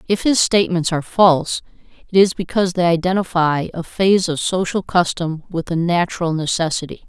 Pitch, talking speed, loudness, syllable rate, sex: 175 Hz, 160 wpm, -18 LUFS, 5.7 syllables/s, female